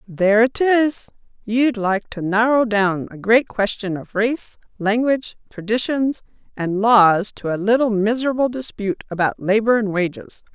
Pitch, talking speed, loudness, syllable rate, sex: 220 Hz, 150 wpm, -19 LUFS, 4.6 syllables/s, female